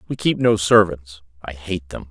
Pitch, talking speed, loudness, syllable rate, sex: 90 Hz, 170 wpm, -18 LUFS, 4.7 syllables/s, male